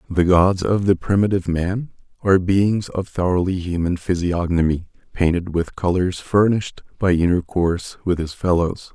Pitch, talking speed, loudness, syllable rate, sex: 90 Hz, 140 wpm, -20 LUFS, 4.9 syllables/s, male